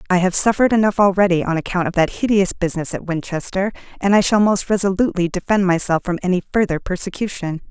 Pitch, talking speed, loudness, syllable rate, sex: 190 Hz, 185 wpm, -18 LUFS, 6.6 syllables/s, female